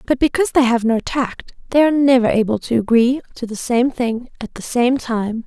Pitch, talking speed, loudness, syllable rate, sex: 245 Hz, 220 wpm, -17 LUFS, 5.3 syllables/s, female